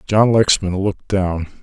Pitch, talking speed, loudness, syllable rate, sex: 95 Hz, 150 wpm, -17 LUFS, 4.4 syllables/s, male